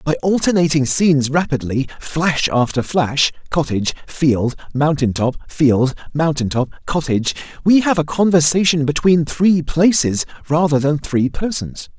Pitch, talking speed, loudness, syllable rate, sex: 150 Hz, 130 wpm, -17 LUFS, 4.5 syllables/s, male